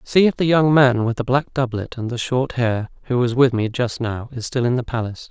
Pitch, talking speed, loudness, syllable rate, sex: 125 Hz, 270 wpm, -20 LUFS, 5.4 syllables/s, male